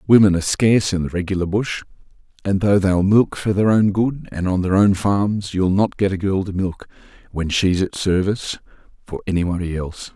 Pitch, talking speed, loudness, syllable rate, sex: 95 Hz, 200 wpm, -19 LUFS, 5.4 syllables/s, male